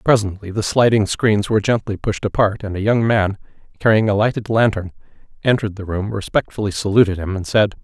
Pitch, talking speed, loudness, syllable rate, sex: 105 Hz, 185 wpm, -18 LUFS, 5.9 syllables/s, male